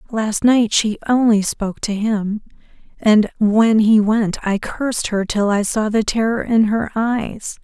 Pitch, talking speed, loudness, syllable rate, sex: 215 Hz, 175 wpm, -17 LUFS, 4.0 syllables/s, female